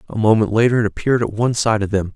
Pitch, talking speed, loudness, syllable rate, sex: 110 Hz, 280 wpm, -17 LUFS, 7.6 syllables/s, male